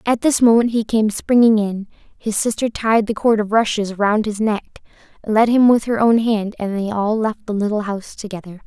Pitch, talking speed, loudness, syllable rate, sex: 215 Hz, 215 wpm, -17 LUFS, 5.0 syllables/s, female